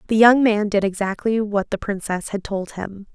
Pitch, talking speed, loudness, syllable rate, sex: 205 Hz, 210 wpm, -20 LUFS, 4.8 syllables/s, female